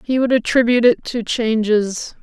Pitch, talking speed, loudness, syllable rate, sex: 230 Hz, 160 wpm, -17 LUFS, 4.8 syllables/s, female